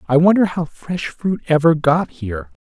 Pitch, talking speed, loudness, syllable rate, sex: 155 Hz, 185 wpm, -18 LUFS, 4.7 syllables/s, male